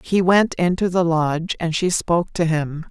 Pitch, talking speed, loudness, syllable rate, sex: 170 Hz, 205 wpm, -19 LUFS, 4.7 syllables/s, female